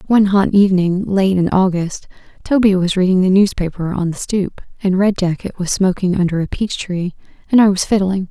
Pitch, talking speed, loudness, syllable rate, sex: 190 Hz, 195 wpm, -16 LUFS, 5.5 syllables/s, female